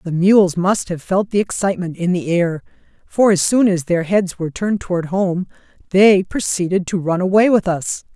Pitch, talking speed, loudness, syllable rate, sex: 185 Hz, 200 wpm, -17 LUFS, 5.1 syllables/s, female